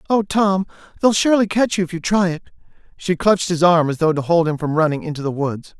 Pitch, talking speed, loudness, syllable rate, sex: 175 Hz, 250 wpm, -18 LUFS, 6.2 syllables/s, male